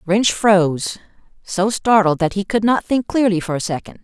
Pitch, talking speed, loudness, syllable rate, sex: 200 Hz, 195 wpm, -17 LUFS, 4.9 syllables/s, female